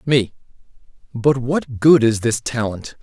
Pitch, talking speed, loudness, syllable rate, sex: 120 Hz, 140 wpm, -18 LUFS, 3.8 syllables/s, male